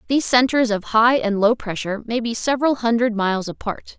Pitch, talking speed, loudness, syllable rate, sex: 230 Hz, 195 wpm, -19 LUFS, 5.9 syllables/s, female